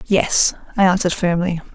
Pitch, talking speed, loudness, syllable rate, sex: 180 Hz, 140 wpm, -17 LUFS, 5.3 syllables/s, female